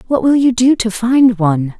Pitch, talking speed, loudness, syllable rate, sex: 230 Hz, 235 wpm, -13 LUFS, 5.0 syllables/s, female